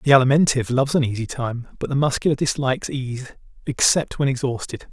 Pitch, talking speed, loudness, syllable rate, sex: 130 Hz, 170 wpm, -21 LUFS, 6.2 syllables/s, male